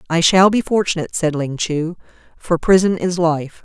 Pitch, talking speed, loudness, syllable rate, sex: 170 Hz, 180 wpm, -17 LUFS, 4.9 syllables/s, female